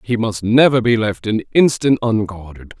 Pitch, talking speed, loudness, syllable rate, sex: 110 Hz, 170 wpm, -16 LUFS, 4.7 syllables/s, male